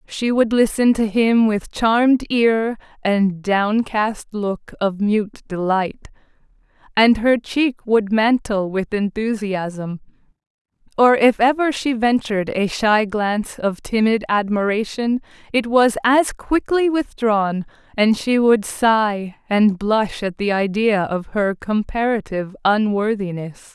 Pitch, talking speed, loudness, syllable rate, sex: 215 Hz, 125 wpm, -19 LUFS, 3.7 syllables/s, female